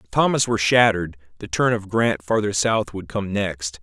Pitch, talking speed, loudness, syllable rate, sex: 105 Hz, 205 wpm, -21 LUFS, 5.1 syllables/s, male